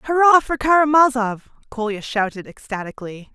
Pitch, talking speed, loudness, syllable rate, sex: 250 Hz, 110 wpm, -18 LUFS, 5.2 syllables/s, female